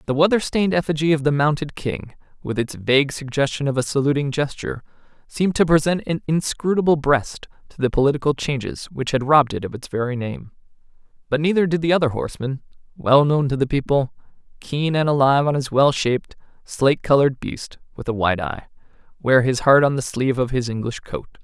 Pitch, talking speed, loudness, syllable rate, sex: 140 Hz, 195 wpm, -20 LUFS, 6.0 syllables/s, male